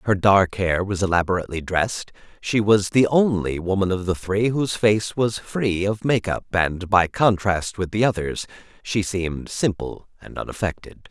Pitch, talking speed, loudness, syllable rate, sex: 100 Hz, 165 wpm, -21 LUFS, 4.7 syllables/s, male